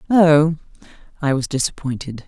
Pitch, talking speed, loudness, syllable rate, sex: 145 Hz, 105 wpm, -18 LUFS, 5.0 syllables/s, female